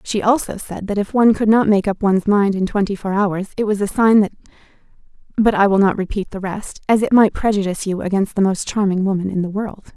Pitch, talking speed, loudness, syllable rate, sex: 200 Hz, 240 wpm, -17 LUFS, 6.0 syllables/s, female